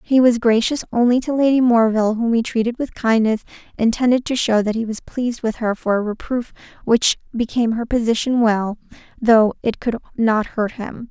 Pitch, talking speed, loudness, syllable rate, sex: 230 Hz, 190 wpm, -18 LUFS, 5.3 syllables/s, female